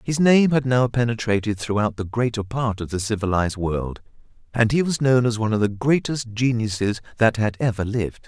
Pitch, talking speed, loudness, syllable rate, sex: 115 Hz, 195 wpm, -21 LUFS, 5.5 syllables/s, male